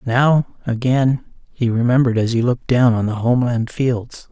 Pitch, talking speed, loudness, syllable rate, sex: 120 Hz, 165 wpm, -18 LUFS, 4.9 syllables/s, male